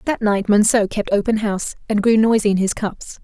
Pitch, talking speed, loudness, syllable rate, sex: 210 Hz, 225 wpm, -18 LUFS, 5.5 syllables/s, female